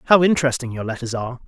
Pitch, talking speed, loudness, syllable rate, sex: 135 Hz, 205 wpm, -20 LUFS, 8.1 syllables/s, male